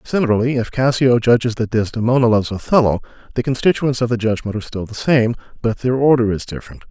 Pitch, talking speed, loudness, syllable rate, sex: 120 Hz, 190 wpm, -17 LUFS, 6.7 syllables/s, male